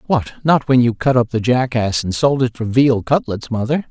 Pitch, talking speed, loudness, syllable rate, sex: 125 Hz, 230 wpm, -16 LUFS, 5.0 syllables/s, male